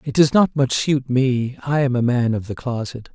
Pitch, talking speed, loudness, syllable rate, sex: 130 Hz, 250 wpm, -19 LUFS, 4.7 syllables/s, male